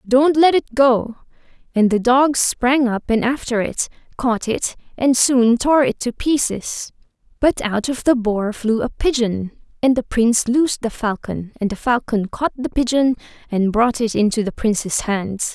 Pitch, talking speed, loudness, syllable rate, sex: 240 Hz, 180 wpm, -18 LUFS, 4.4 syllables/s, female